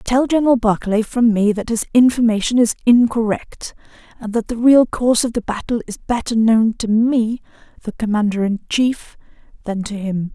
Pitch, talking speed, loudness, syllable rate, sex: 225 Hz, 175 wpm, -17 LUFS, 5.0 syllables/s, female